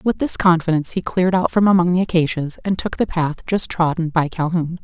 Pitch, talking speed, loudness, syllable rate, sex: 170 Hz, 225 wpm, -18 LUFS, 5.7 syllables/s, female